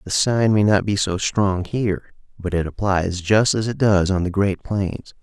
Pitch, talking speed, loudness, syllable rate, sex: 100 Hz, 220 wpm, -20 LUFS, 4.4 syllables/s, male